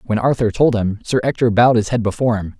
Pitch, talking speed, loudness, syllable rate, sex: 115 Hz, 255 wpm, -17 LUFS, 6.5 syllables/s, male